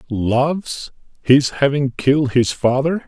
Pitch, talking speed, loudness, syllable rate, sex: 135 Hz, 115 wpm, -17 LUFS, 3.9 syllables/s, male